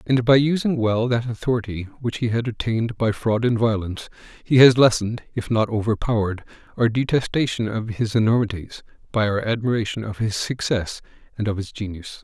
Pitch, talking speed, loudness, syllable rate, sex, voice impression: 115 Hz, 170 wpm, -21 LUFS, 5.7 syllables/s, male, masculine, middle-aged, thick, tensed, powerful, hard, slightly muffled, intellectual, calm, slightly mature, slightly reassuring, wild, lively, slightly strict